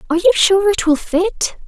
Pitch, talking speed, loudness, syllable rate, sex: 350 Hz, 215 wpm, -15 LUFS, 5.4 syllables/s, female